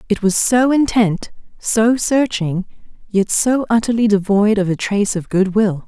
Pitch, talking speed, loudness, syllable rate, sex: 210 Hz, 165 wpm, -16 LUFS, 4.4 syllables/s, female